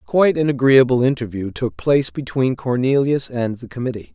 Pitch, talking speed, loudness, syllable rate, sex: 125 Hz, 160 wpm, -18 LUFS, 5.5 syllables/s, male